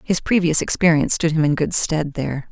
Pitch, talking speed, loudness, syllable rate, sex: 160 Hz, 215 wpm, -18 LUFS, 5.9 syllables/s, female